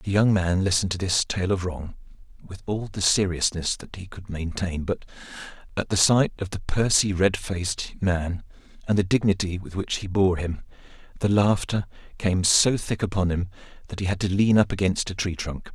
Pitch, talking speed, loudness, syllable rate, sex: 95 Hz, 200 wpm, -24 LUFS, 5.1 syllables/s, male